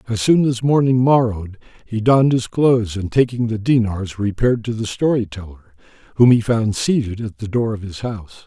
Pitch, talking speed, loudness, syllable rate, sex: 115 Hz, 200 wpm, -18 LUFS, 5.6 syllables/s, male